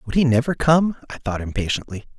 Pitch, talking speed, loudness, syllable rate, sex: 130 Hz, 190 wpm, -21 LUFS, 6.0 syllables/s, male